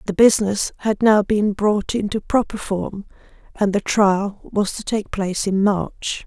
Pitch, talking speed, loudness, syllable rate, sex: 205 Hz, 170 wpm, -20 LUFS, 4.2 syllables/s, female